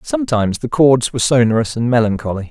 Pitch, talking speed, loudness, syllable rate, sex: 125 Hz, 170 wpm, -15 LUFS, 6.6 syllables/s, male